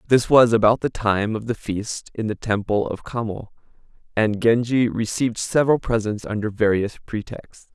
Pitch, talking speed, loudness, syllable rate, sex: 110 Hz, 165 wpm, -21 LUFS, 4.9 syllables/s, male